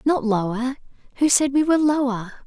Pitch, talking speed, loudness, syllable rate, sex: 260 Hz, 170 wpm, -20 LUFS, 5.4 syllables/s, female